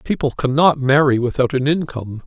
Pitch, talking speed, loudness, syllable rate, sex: 140 Hz, 160 wpm, -17 LUFS, 5.7 syllables/s, male